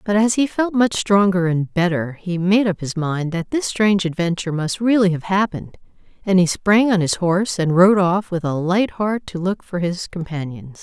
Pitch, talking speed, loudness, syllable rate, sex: 185 Hz, 215 wpm, -19 LUFS, 5.0 syllables/s, female